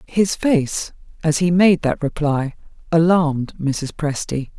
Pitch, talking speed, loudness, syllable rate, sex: 160 Hz, 130 wpm, -19 LUFS, 3.8 syllables/s, female